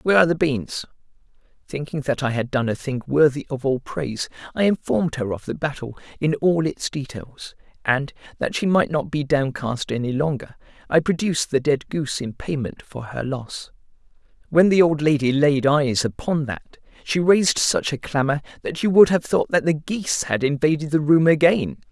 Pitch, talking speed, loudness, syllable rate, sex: 145 Hz, 190 wpm, -21 LUFS, 5.1 syllables/s, male